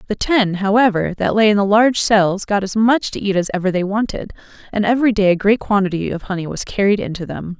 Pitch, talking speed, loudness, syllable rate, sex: 200 Hz, 245 wpm, -17 LUFS, 6.0 syllables/s, female